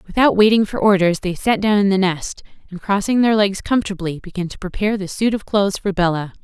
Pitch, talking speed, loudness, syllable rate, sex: 195 Hz, 225 wpm, -18 LUFS, 6.1 syllables/s, female